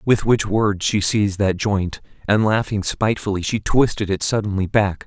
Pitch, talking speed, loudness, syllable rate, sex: 100 Hz, 180 wpm, -19 LUFS, 4.9 syllables/s, male